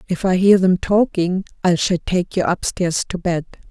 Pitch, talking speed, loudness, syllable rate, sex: 185 Hz, 195 wpm, -18 LUFS, 4.7 syllables/s, female